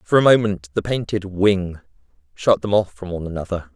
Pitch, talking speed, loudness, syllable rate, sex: 95 Hz, 190 wpm, -20 LUFS, 5.6 syllables/s, male